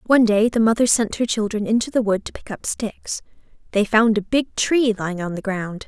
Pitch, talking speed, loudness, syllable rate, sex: 215 Hz, 235 wpm, -20 LUFS, 5.4 syllables/s, female